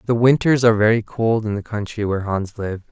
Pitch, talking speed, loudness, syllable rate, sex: 110 Hz, 225 wpm, -19 LUFS, 6.3 syllables/s, male